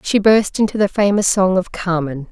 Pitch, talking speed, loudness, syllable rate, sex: 190 Hz, 205 wpm, -16 LUFS, 5.0 syllables/s, female